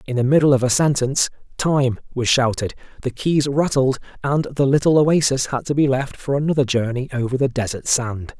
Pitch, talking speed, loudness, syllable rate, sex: 135 Hz, 195 wpm, -19 LUFS, 5.4 syllables/s, male